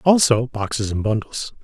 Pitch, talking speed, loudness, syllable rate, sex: 120 Hz, 145 wpm, -20 LUFS, 4.8 syllables/s, male